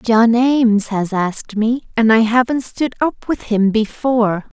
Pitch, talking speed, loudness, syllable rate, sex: 230 Hz, 170 wpm, -16 LUFS, 4.2 syllables/s, female